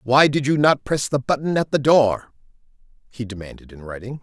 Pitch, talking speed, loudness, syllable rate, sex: 130 Hz, 200 wpm, -19 LUFS, 5.4 syllables/s, male